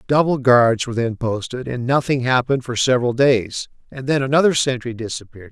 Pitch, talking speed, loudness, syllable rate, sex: 125 Hz, 165 wpm, -18 LUFS, 5.8 syllables/s, male